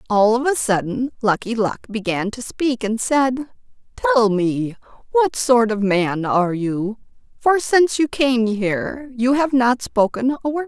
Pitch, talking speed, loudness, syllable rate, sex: 240 Hz, 170 wpm, -19 LUFS, 4.1 syllables/s, female